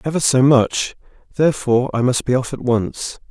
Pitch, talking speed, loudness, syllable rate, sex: 130 Hz, 180 wpm, -17 LUFS, 5.2 syllables/s, male